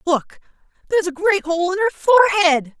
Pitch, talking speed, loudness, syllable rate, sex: 360 Hz, 195 wpm, -17 LUFS, 7.8 syllables/s, female